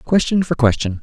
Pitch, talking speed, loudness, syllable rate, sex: 140 Hz, 175 wpm, -17 LUFS, 5.1 syllables/s, male